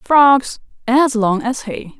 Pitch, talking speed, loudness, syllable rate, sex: 245 Hz, 150 wpm, -15 LUFS, 3.0 syllables/s, female